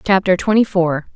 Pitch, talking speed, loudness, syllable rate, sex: 185 Hz, 155 wpm, -16 LUFS, 5.2 syllables/s, female